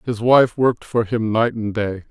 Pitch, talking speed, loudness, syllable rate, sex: 115 Hz, 230 wpm, -18 LUFS, 4.7 syllables/s, male